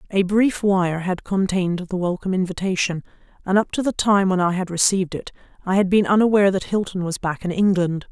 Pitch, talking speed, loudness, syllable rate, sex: 190 Hz, 205 wpm, -20 LUFS, 5.9 syllables/s, female